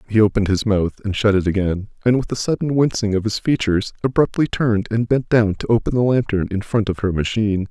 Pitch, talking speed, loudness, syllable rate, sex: 110 Hz, 235 wpm, -19 LUFS, 6.2 syllables/s, male